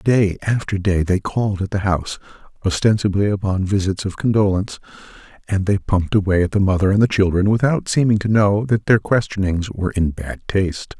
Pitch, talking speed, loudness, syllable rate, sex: 100 Hz, 185 wpm, -18 LUFS, 5.7 syllables/s, male